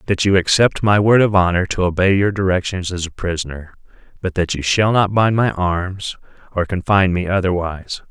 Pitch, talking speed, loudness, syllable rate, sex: 95 Hz, 190 wpm, -17 LUFS, 5.4 syllables/s, male